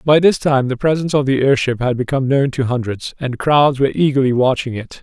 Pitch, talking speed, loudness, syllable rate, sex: 135 Hz, 225 wpm, -16 LUFS, 5.9 syllables/s, male